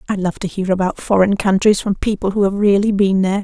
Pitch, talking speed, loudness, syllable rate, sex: 195 Hz, 245 wpm, -16 LUFS, 6.2 syllables/s, female